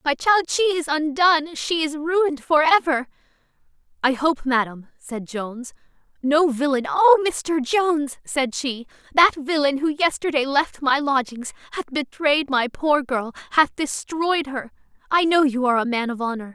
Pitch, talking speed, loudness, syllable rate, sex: 290 Hz, 155 wpm, -21 LUFS, 4.5 syllables/s, female